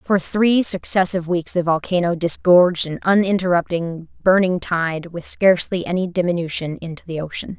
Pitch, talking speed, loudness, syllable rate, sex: 175 Hz, 140 wpm, -19 LUFS, 5.1 syllables/s, female